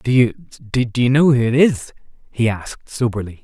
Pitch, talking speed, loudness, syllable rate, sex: 120 Hz, 175 wpm, -17 LUFS, 4.8 syllables/s, male